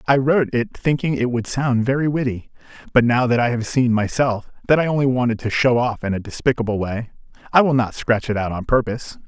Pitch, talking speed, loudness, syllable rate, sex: 120 Hz, 225 wpm, -19 LUFS, 5.9 syllables/s, male